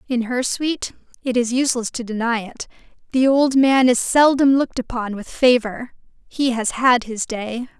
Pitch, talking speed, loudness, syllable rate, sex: 245 Hz, 160 wpm, -19 LUFS, 4.8 syllables/s, female